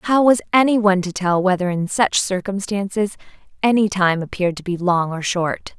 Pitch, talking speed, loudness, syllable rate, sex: 195 Hz, 175 wpm, -19 LUFS, 5.0 syllables/s, female